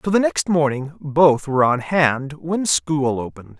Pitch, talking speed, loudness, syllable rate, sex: 150 Hz, 185 wpm, -19 LUFS, 4.4 syllables/s, male